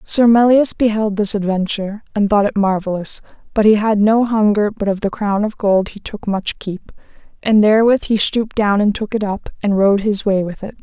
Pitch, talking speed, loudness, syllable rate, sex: 210 Hz, 215 wpm, -16 LUFS, 5.2 syllables/s, female